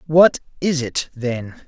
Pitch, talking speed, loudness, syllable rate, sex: 140 Hz, 145 wpm, -19 LUFS, 3.2 syllables/s, male